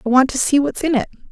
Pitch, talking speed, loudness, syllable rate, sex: 270 Hz, 320 wpm, -17 LUFS, 7.1 syllables/s, female